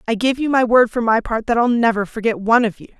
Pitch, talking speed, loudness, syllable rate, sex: 230 Hz, 300 wpm, -17 LUFS, 6.6 syllables/s, female